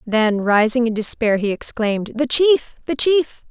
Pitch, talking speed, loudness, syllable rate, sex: 240 Hz, 170 wpm, -18 LUFS, 4.4 syllables/s, female